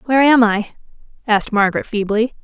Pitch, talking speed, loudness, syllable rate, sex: 225 Hz, 150 wpm, -16 LUFS, 6.7 syllables/s, female